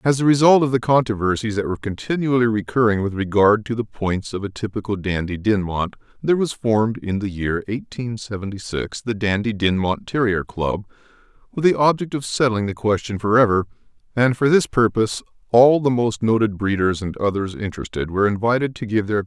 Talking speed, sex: 195 wpm, male